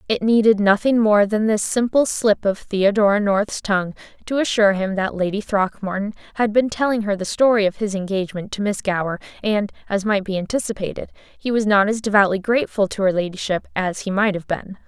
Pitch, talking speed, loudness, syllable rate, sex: 205 Hz, 200 wpm, -20 LUFS, 5.6 syllables/s, female